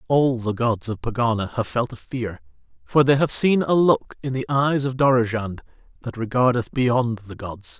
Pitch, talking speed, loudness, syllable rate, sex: 120 Hz, 190 wpm, -21 LUFS, 4.6 syllables/s, male